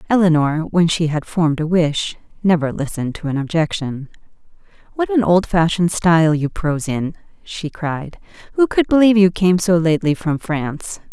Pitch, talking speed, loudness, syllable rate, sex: 170 Hz, 165 wpm, -17 LUFS, 5.3 syllables/s, female